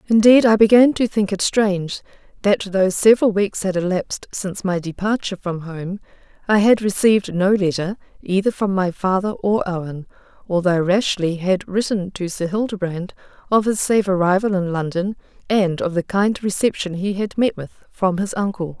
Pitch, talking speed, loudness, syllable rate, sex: 195 Hz, 170 wpm, -19 LUFS, 5.1 syllables/s, female